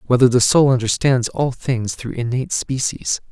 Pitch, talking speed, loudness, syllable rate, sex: 125 Hz, 165 wpm, -18 LUFS, 4.9 syllables/s, male